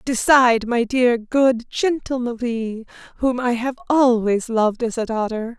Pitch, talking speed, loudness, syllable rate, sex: 240 Hz, 150 wpm, -19 LUFS, 4.2 syllables/s, female